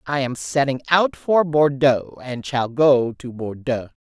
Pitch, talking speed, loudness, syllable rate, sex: 135 Hz, 165 wpm, -20 LUFS, 3.8 syllables/s, female